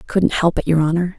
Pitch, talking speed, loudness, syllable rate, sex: 170 Hz, 305 wpm, -17 LUFS, 6.3 syllables/s, female